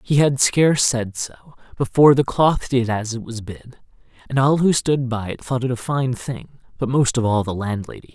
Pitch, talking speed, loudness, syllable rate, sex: 125 Hz, 215 wpm, -19 LUFS, 5.0 syllables/s, male